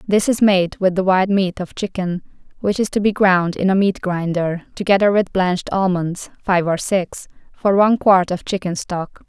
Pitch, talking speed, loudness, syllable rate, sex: 190 Hz, 200 wpm, -18 LUFS, 4.9 syllables/s, female